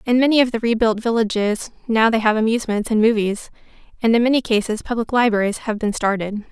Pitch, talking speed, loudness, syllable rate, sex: 225 Hz, 195 wpm, -19 LUFS, 6.1 syllables/s, female